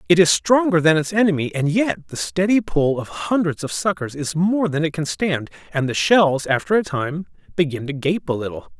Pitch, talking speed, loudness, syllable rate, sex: 155 Hz, 220 wpm, -20 LUFS, 5.1 syllables/s, male